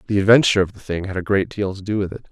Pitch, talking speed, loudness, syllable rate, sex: 100 Hz, 335 wpm, -19 LUFS, 7.6 syllables/s, male